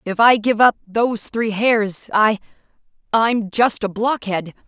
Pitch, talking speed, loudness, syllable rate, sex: 220 Hz, 140 wpm, -18 LUFS, 3.9 syllables/s, female